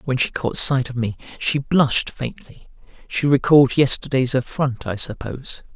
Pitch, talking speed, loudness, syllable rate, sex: 130 Hz, 155 wpm, -20 LUFS, 4.8 syllables/s, male